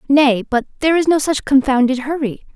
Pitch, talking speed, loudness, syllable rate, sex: 275 Hz, 190 wpm, -16 LUFS, 5.8 syllables/s, female